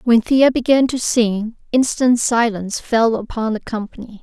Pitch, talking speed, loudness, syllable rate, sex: 230 Hz, 155 wpm, -17 LUFS, 4.5 syllables/s, female